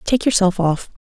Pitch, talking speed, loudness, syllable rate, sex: 200 Hz, 175 wpm, -17 LUFS, 4.8 syllables/s, female